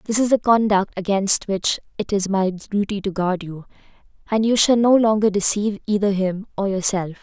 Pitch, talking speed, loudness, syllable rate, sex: 200 Hz, 190 wpm, -19 LUFS, 5.2 syllables/s, female